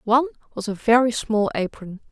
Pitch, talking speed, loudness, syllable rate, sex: 230 Hz, 170 wpm, -22 LUFS, 5.7 syllables/s, female